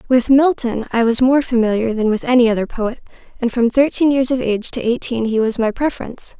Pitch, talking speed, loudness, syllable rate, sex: 240 Hz, 215 wpm, -17 LUFS, 5.9 syllables/s, female